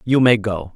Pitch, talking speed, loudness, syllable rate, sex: 110 Hz, 240 wpm, -17 LUFS, 4.6 syllables/s, male